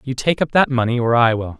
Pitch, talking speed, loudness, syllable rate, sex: 125 Hz, 300 wpm, -17 LUFS, 6.0 syllables/s, male